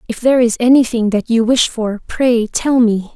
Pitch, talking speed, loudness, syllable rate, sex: 230 Hz, 210 wpm, -14 LUFS, 5.1 syllables/s, female